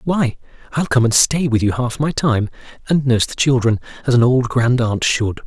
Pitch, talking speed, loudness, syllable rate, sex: 125 Hz, 220 wpm, -17 LUFS, 5.1 syllables/s, male